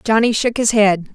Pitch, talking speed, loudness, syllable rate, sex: 220 Hz, 210 wpm, -15 LUFS, 4.9 syllables/s, female